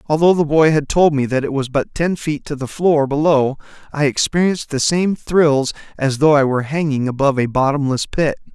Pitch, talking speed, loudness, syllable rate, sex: 145 Hz, 210 wpm, -17 LUFS, 5.4 syllables/s, male